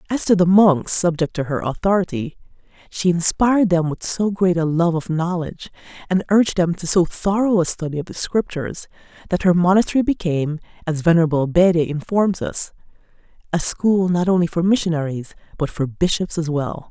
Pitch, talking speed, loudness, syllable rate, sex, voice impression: 175 Hz, 175 wpm, -19 LUFS, 5.5 syllables/s, female, very feminine, very adult-like, slightly old, slightly thin, slightly tensed, powerful, slightly dark, very soft, clear, fluent, slightly raspy, cute, slightly cool, very intellectual, slightly refreshing, very sincere, very calm, very friendly, very reassuring, very unique, very elegant, very sweet, slightly lively, kind, slightly intense